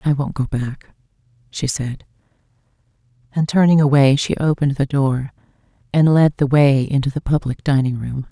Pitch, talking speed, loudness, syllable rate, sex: 135 Hz, 160 wpm, -18 LUFS, 5.0 syllables/s, female